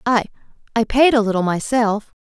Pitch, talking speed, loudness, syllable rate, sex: 225 Hz, 135 wpm, -18 LUFS, 5.2 syllables/s, female